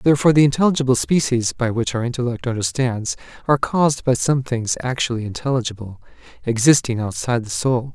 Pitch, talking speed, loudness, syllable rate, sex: 125 Hz, 150 wpm, -19 LUFS, 6.1 syllables/s, male